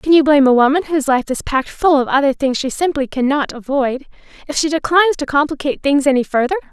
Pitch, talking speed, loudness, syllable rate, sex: 285 Hz, 225 wpm, -16 LUFS, 6.8 syllables/s, female